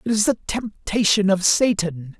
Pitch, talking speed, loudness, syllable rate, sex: 200 Hz, 165 wpm, -20 LUFS, 4.5 syllables/s, male